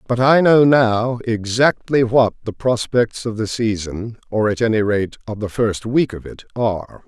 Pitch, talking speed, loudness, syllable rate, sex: 115 Hz, 170 wpm, -18 LUFS, 4.4 syllables/s, male